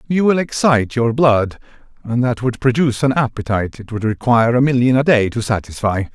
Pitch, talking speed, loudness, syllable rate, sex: 120 Hz, 195 wpm, -16 LUFS, 5.8 syllables/s, male